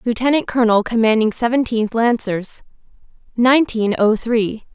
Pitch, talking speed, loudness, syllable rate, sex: 230 Hz, 100 wpm, -17 LUFS, 5.0 syllables/s, female